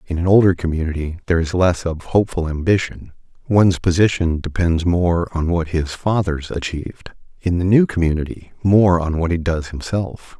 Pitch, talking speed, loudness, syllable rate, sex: 85 Hz, 165 wpm, -18 LUFS, 5.2 syllables/s, male